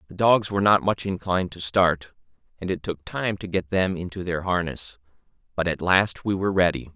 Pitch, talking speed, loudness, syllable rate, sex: 90 Hz, 205 wpm, -24 LUFS, 5.4 syllables/s, male